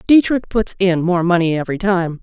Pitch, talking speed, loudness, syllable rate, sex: 185 Hz, 190 wpm, -16 LUFS, 5.3 syllables/s, female